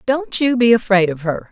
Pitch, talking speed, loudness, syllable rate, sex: 215 Hz, 240 wpm, -16 LUFS, 5.0 syllables/s, female